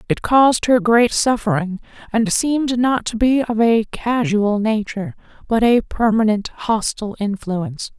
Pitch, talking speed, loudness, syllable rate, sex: 220 Hz, 145 wpm, -18 LUFS, 4.5 syllables/s, female